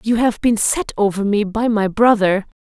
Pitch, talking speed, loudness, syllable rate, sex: 215 Hz, 205 wpm, -17 LUFS, 4.7 syllables/s, female